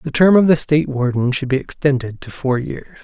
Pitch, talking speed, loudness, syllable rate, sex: 140 Hz, 240 wpm, -17 LUFS, 5.7 syllables/s, male